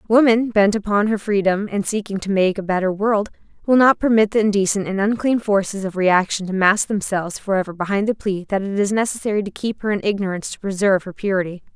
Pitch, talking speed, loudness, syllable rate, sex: 200 Hz, 215 wpm, -19 LUFS, 6.1 syllables/s, female